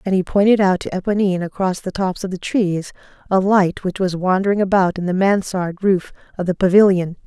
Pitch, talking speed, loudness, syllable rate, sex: 190 Hz, 205 wpm, -18 LUFS, 5.6 syllables/s, female